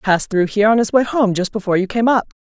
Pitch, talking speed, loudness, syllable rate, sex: 210 Hz, 320 wpm, -16 LUFS, 7.8 syllables/s, female